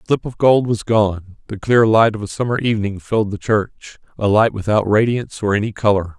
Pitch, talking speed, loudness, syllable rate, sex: 105 Hz, 225 wpm, -17 LUFS, 5.7 syllables/s, male